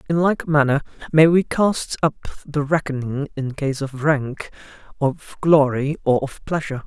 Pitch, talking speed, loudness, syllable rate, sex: 145 Hz, 155 wpm, -20 LUFS, 4.5 syllables/s, male